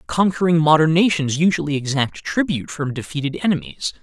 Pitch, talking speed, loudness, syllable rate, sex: 155 Hz, 135 wpm, -19 LUFS, 5.8 syllables/s, male